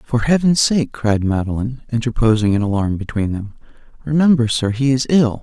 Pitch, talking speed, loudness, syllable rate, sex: 120 Hz, 165 wpm, -17 LUFS, 5.4 syllables/s, male